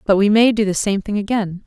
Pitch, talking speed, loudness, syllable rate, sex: 205 Hz, 290 wpm, -17 LUFS, 5.9 syllables/s, female